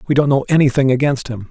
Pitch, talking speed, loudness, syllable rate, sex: 135 Hz, 240 wpm, -15 LUFS, 6.8 syllables/s, male